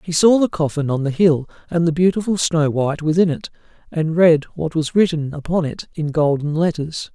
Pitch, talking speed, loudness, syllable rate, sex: 160 Hz, 200 wpm, -18 LUFS, 5.3 syllables/s, male